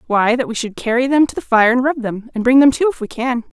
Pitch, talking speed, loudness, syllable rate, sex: 245 Hz, 320 wpm, -16 LUFS, 6.1 syllables/s, female